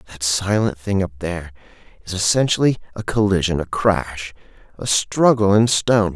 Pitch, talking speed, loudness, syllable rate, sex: 95 Hz, 145 wpm, -19 LUFS, 5.2 syllables/s, male